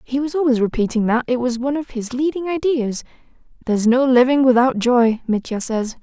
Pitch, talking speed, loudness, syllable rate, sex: 250 Hz, 190 wpm, -18 LUFS, 5.6 syllables/s, female